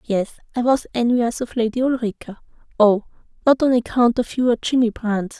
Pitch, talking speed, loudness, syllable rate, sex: 235 Hz, 155 wpm, -20 LUFS, 5.5 syllables/s, female